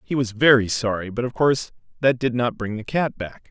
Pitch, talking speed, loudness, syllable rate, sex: 120 Hz, 240 wpm, -21 LUFS, 5.5 syllables/s, male